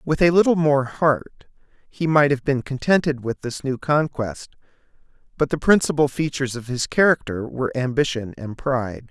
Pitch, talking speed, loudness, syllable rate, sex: 135 Hz, 165 wpm, -21 LUFS, 5.1 syllables/s, male